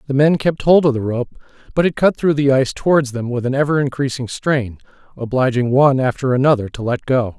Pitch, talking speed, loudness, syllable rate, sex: 135 Hz, 220 wpm, -17 LUFS, 6.0 syllables/s, male